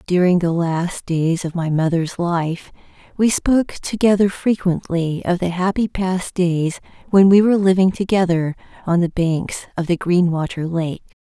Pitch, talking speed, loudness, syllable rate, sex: 180 Hz, 155 wpm, -18 LUFS, 4.5 syllables/s, female